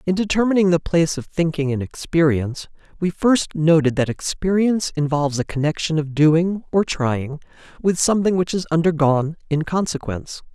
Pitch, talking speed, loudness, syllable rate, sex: 165 Hz, 155 wpm, -20 LUFS, 5.4 syllables/s, male